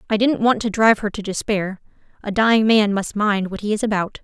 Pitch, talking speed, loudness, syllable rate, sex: 210 Hz, 240 wpm, -19 LUFS, 5.8 syllables/s, female